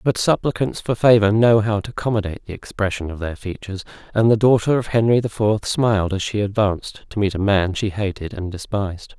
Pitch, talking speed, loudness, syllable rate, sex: 105 Hz, 210 wpm, -20 LUFS, 5.8 syllables/s, male